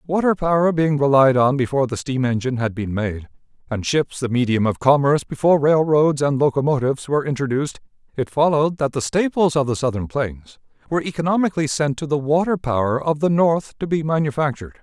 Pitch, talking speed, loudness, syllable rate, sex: 140 Hz, 185 wpm, -19 LUFS, 6.1 syllables/s, male